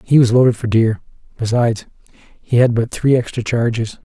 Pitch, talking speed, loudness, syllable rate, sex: 115 Hz, 175 wpm, -16 LUFS, 5.3 syllables/s, male